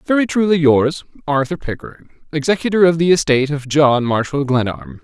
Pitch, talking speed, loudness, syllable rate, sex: 145 Hz, 155 wpm, -16 LUFS, 5.6 syllables/s, male